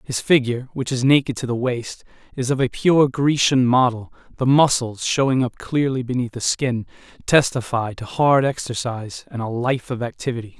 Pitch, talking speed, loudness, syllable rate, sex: 125 Hz, 175 wpm, -20 LUFS, 5.1 syllables/s, male